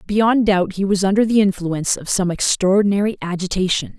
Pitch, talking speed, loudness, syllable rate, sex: 195 Hz, 165 wpm, -18 LUFS, 5.5 syllables/s, female